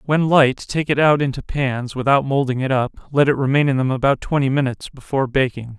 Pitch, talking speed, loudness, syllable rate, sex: 135 Hz, 205 wpm, -18 LUFS, 5.9 syllables/s, male